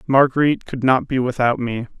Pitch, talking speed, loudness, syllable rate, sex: 130 Hz, 180 wpm, -18 LUFS, 5.7 syllables/s, male